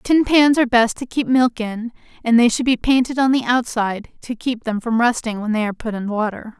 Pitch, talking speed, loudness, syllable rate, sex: 235 Hz, 245 wpm, -18 LUFS, 5.6 syllables/s, female